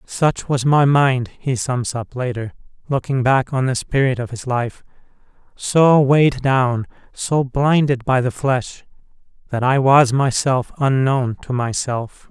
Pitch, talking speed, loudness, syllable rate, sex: 130 Hz, 150 wpm, -18 LUFS, 3.9 syllables/s, male